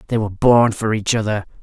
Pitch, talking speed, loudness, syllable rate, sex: 110 Hz, 220 wpm, -17 LUFS, 6.2 syllables/s, male